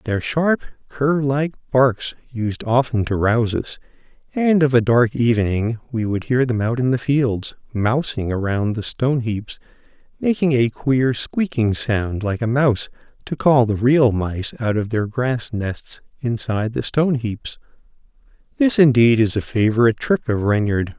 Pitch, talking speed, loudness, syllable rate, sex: 120 Hz, 165 wpm, -19 LUFS, 4.4 syllables/s, male